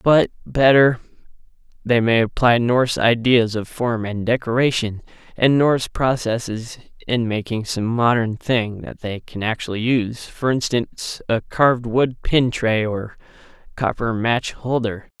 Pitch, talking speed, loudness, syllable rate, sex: 115 Hz, 140 wpm, -19 LUFS, 4.4 syllables/s, male